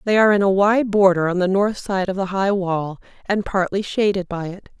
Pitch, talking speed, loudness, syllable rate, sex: 195 Hz, 240 wpm, -19 LUFS, 5.3 syllables/s, female